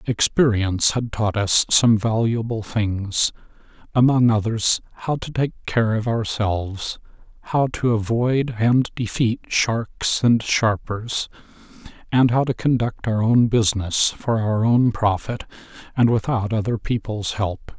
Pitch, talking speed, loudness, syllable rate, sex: 115 Hz, 130 wpm, -20 LUFS, 4.0 syllables/s, male